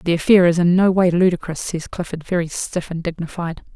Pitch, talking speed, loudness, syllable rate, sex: 175 Hz, 210 wpm, -19 LUFS, 5.7 syllables/s, female